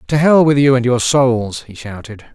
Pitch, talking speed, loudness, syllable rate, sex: 130 Hz, 230 wpm, -13 LUFS, 4.7 syllables/s, male